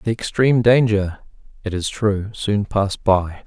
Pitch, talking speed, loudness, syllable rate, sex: 105 Hz, 155 wpm, -19 LUFS, 4.5 syllables/s, male